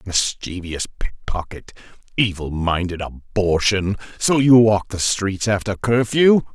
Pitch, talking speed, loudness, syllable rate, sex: 100 Hz, 120 wpm, -19 LUFS, 4.0 syllables/s, male